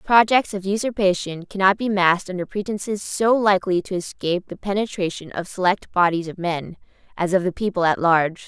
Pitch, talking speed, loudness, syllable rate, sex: 190 Hz, 175 wpm, -21 LUFS, 5.6 syllables/s, female